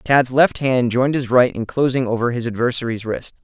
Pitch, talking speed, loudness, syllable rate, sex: 125 Hz, 210 wpm, -18 LUFS, 5.5 syllables/s, male